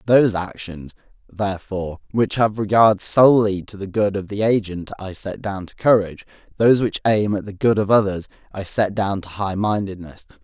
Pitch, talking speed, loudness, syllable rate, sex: 100 Hz, 180 wpm, -20 LUFS, 5.2 syllables/s, male